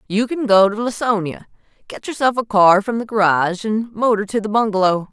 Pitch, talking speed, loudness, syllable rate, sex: 210 Hz, 200 wpm, -17 LUFS, 5.5 syllables/s, female